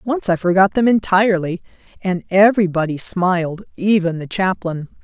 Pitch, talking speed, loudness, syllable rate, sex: 185 Hz, 120 wpm, -17 LUFS, 5.2 syllables/s, female